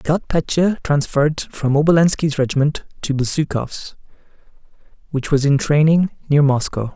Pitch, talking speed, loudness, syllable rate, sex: 145 Hz, 130 wpm, -18 LUFS, 5.0 syllables/s, male